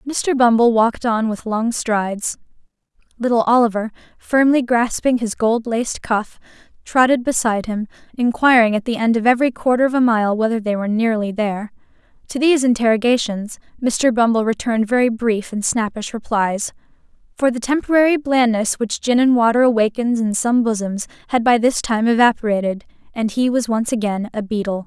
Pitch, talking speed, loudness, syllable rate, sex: 230 Hz, 165 wpm, -18 LUFS, 5.5 syllables/s, female